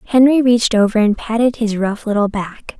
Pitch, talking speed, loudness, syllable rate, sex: 225 Hz, 195 wpm, -15 LUFS, 5.4 syllables/s, female